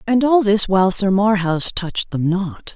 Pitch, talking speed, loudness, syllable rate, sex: 195 Hz, 195 wpm, -17 LUFS, 4.7 syllables/s, female